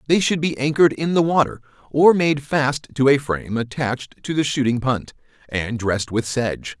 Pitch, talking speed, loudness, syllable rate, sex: 135 Hz, 195 wpm, -20 LUFS, 5.3 syllables/s, male